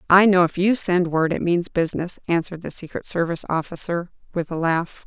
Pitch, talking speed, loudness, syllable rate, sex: 175 Hz, 200 wpm, -21 LUFS, 5.7 syllables/s, female